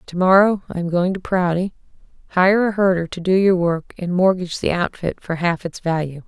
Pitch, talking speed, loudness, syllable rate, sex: 180 Hz, 210 wpm, -19 LUFS, 5.3 syllables/s, female